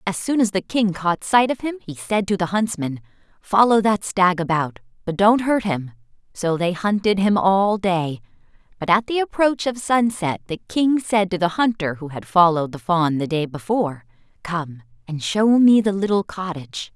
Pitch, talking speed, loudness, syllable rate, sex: 185 Hz, 195 wpm, -20 LUFS, 4.8 syllables/s, female